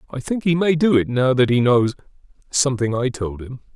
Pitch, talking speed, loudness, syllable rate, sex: 130 Hz, 210 wpm, -19 LUFS, 5.5 syllables/s, male